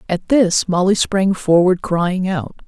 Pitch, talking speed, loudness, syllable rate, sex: 190 Hz, 155 wpm, -16 LUFS, 3.8 syllables/s, female